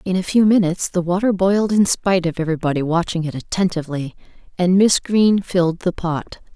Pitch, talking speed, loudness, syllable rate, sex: 180 Hz, 185 wpm, -18 LUFS, 6.1 syllables/s, female